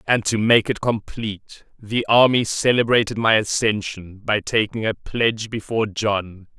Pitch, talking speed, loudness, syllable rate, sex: 110 Hz, 145 wpm, -20 LUFS, 4.7 syllables/s, male